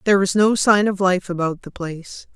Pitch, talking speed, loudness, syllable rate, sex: 190 Hz, 230 wpm, -19 LUFS, 5.5 syllables/s, female